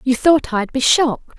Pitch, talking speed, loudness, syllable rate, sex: 265 Hz, 215 wpm, -16 LUFS, 5.2 syllables/s, female